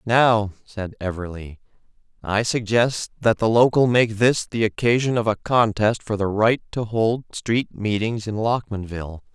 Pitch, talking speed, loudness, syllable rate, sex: 110 Hz, 155 wpm, -21 LUFS, 4.4 syllables/s, male